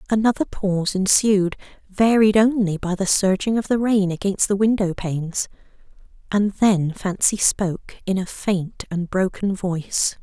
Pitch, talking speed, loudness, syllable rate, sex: 195 Hz, 145 wpm, -20 LUFS, 4.5 syllables/s, female